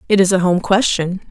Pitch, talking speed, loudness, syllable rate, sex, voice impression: 190 Hz, 230 wpm, -15 LUFS, 5.6 syllables/s, female, very feminine, slightly young, slightly adult-like, very thin, slightly relaxed, slightly weak, slightly dark, soft, slightly clear, fluent, slightly raspy, cute, very intellectual, very refreshing, sincere, calm, friendly, reassuring, unique, elegant, slightly wild, very sweet, slightly lively, very kind, modest, light